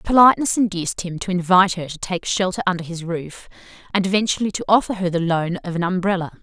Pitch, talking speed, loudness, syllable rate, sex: 185 Hz, 205 wpm, -20 LUFS, 6.4 syllables/s, female